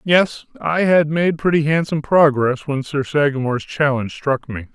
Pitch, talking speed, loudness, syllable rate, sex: 150 Hz, 165 wpm, -18 LUFS, 4.7 syllables/s, male